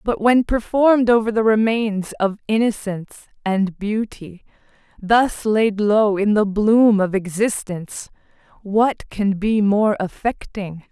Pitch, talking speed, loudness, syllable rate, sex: 210 Hz, 125 wpm, -19 LUFS, 3.9 syllables/s, female